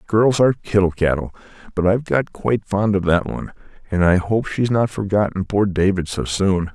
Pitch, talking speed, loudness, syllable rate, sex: 100 Hz, 195 wpm, -19 LUFS, 5.4 syllables/s, male